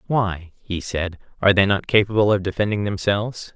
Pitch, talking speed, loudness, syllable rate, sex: 100 Hz, 170 wpm, -21 LUFS, 5.6 syllables/s, male